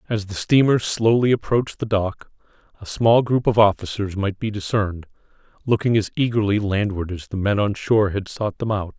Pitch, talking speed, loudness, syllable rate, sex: 105 Hz, 185 wpm, -20 LUFS, 5.4 syllables/s, male